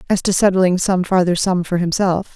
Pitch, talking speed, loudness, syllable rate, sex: 185 Hz, 205 wpm, -16 LUFS, 5.1 syllables/s, female